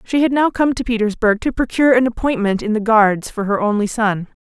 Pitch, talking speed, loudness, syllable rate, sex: 225 Hz, 230 wpm, -17 LUFS, 5.7 syllables/s, female